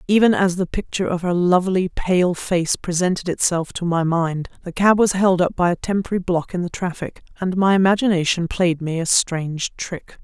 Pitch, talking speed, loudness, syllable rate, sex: 180 Hz, 195 wpm, -19 LUFS, 5.3 syllables/s, female